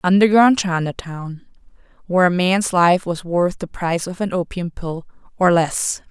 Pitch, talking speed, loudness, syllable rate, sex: 180 Hz, 140 wpm, -18 LUFS, 4.5 syllables/s, female